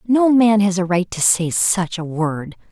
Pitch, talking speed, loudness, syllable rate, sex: 190 Hz, 220 wpm, -17 LUFS, 4.1 syllables/s, female